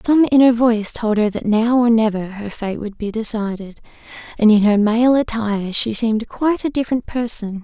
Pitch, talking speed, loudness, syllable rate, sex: 225 Hz, 195 wpm, -17 LUFS, 5.4 syllables/s, female